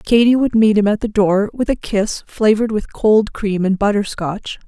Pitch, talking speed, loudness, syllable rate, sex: 210 Hz, 220 wpm, -16 LUFS, 4.7 syllables/s, female